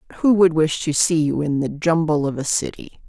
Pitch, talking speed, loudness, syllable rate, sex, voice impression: 160 Hz, 235 wpm, -19 LUFS, 5.4 syllables/s, female, very feminine, very adult-like, slightly calm, elegant